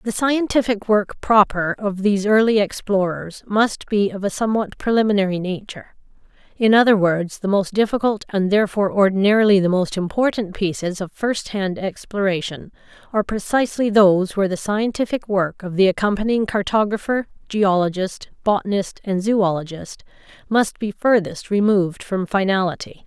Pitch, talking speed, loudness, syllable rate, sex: 200 Hz, 135 wpm, -19 LUFS, 5.3 syllables/s, female